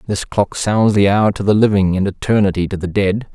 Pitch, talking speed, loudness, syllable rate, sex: 100 Hz, 235 wpm, -15 LUFS, 5.4 syllables/s, male